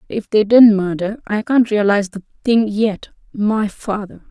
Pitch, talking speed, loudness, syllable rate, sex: 210 Hz, 140 wpm, -16 LUFS, 4.6 syllables/s, female